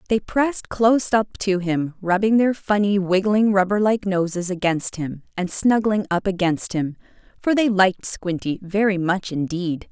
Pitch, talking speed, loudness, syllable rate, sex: 195 Hz, 165 wpm, -21 LUFS, 4.5 syllables/s, female